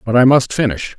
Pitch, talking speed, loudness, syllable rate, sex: 125 Hz, 245 wpm, -14 LUFS, 5.8 syllables/s, male